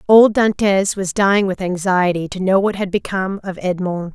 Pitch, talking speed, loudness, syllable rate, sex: 190 Hz, 190 wpm, -17 LUFS, 5.1 syllables/s, female